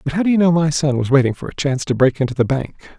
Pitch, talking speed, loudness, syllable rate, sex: 145 Hz, 340 wpm, -17 LUFS, 7.1 syllables/s, male